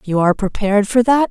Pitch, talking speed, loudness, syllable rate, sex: 215 Hz, 230 wpm, -16 LUFS, 6.6 syllables/s, female